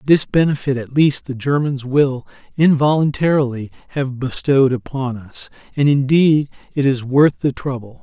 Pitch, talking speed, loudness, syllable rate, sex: 135 Hz, 140 wpm, -17 LUFS, 4.7 syllables/s, male